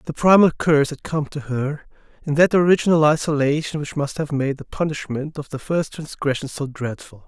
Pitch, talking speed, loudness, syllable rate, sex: 150 Hz, 190 wpm, -20 LUFS, 5.4 syllables/s, male